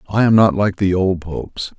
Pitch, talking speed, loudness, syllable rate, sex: 95 Hz, 235 wpm, -16 LUFS, 5.2 syllables/s, male